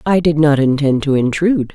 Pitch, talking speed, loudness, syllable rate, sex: 150 Hz, 205 wpm, -14 LUFS, 5.5 syllables/s, female